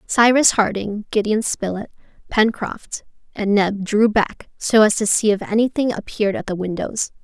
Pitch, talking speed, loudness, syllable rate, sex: 215 Hz, 160 wpm, -19 LUFS, 4.7 syllables/s, female